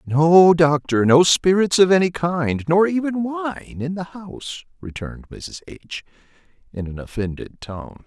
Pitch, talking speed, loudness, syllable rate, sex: 155 Hz, 150 wpm, -18 LUFS, 4.2 syllables/s, male